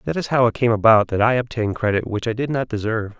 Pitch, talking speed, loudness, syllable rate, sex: 115 Hz, 280 wpm, -19 LUFS, 6.8 syllables/s, male